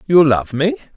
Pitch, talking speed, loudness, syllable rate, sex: 145 Hz, 190 wpm, -15 LUFS, 4.6 syllables/s, male